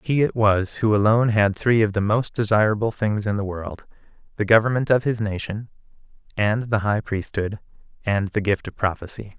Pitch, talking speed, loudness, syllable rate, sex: 105 Hz, 180 wpm, -21 LUFS, 5.1 syllables/s, male